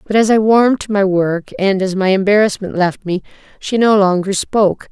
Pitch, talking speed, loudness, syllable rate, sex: 200 Hz, 210 wpm, -14 LUFS, 5.2 syllables/s, female